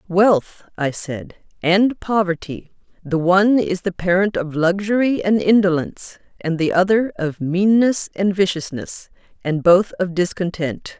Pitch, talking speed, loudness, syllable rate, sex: 185 Hz, 135 wpm, -18 LUFS, 4.2 syllables/s, female